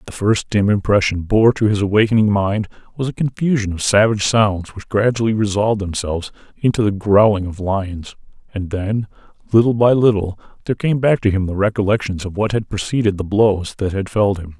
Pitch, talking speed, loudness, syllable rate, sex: 105 Hz, 190 wpm, -17 LUFS, 5.8 syllables/s, male